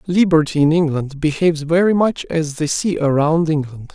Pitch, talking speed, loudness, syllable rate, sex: 160 Hz, 165 wpm, -17 LUFS, 5.0 syllables/s, male